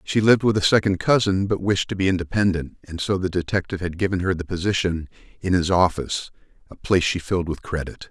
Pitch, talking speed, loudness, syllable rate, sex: 90 Hz, 215 wpm, -22 LUFS, 6.4 syllables/s, male